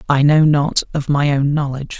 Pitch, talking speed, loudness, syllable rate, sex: 145 Hz, 210 wpm, -16 LUFS, 5.3 syllables/s, male